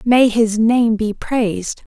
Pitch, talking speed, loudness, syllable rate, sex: 225 Hz, 155 wpm, -16 LUFS, 3.4 syllables/s, female